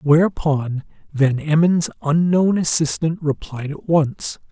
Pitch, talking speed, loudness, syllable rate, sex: 155 Hz, 105 wpm, -19 LUFS, 3.8 syllables/s, male